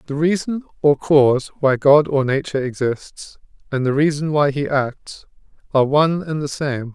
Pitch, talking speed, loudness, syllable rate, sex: 145 Hz, 175 wpm, -18 LUFS, 4.9 syllables/s, male